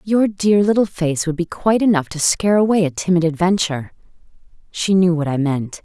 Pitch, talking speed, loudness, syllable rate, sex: 175 Hz, 195 wpm, -17 LUFS, 5.7 syllables/s, female